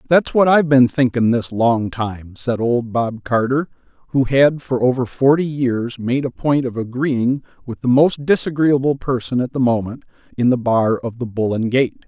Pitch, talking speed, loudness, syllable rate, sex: 125 Hz, 195 wpm, -18 LUFS, 4.6 syllables/s, male